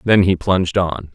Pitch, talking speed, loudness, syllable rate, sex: 90 Hz, 210 wpm, -17 LUFS, 4.8 syllables/s, male